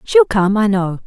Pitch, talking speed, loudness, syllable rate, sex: 215 Hz, 225 wpm, -15 LUFS, 4.4 syllables/s, female